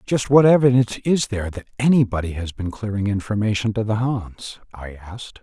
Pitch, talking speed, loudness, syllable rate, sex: 110 Hz, 175 wpm, -20 LUFS, 5.8 syllables/s, male